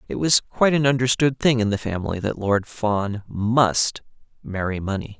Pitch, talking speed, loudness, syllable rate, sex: 115 Hz, 175 wpm, -21 LUFS, 4.9 syllables/s, male